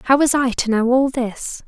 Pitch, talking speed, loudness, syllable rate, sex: 250 Hz, 250 wpm, -18 LUFS, 4.7 syllables/s, female